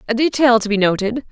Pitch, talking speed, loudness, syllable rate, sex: 230 Hz, 230 wpm, -16 LUFS, 6.3 syllables/s, female